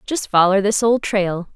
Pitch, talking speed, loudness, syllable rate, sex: 205 Hz, 195 wpm, -17 LUFS, 4.2 syllables/s, female